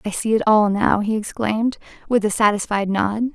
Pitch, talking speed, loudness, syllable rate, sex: 215 Hz, 195 wpm, -19 LUFS, 5.3 syllables/s, female